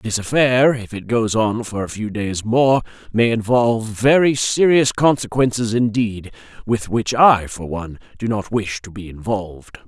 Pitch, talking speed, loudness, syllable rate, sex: 110 Hz, 170 wpm, -18 LUFS, 4.5 syllables/s, male